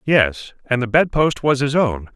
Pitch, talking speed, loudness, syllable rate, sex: 130 Hz, 195 wpm, -18 LUFS, 4.2 syllables/s, male